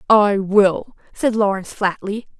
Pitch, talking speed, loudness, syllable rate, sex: 205 Hz, 125 wpm, -18 LUFS, 4.1 syllables/s, female